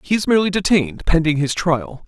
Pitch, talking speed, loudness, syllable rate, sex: 165 Hz, 205 wpm, -18 LUFS, 6.2 syllables/s, male